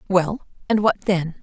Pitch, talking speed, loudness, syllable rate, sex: 185 Hz, 170 wpm, -21 LUFS, 4.5 syllables/s, female